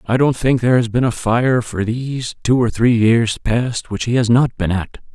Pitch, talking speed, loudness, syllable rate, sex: 120 Hz, 245 wpm, -17 LUFS, 4.8 syllables/s, male